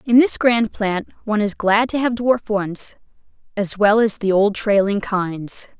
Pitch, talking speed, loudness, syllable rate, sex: 210 Hz, 185 wpm, -18 LUFS, 4.1 syllables/s, female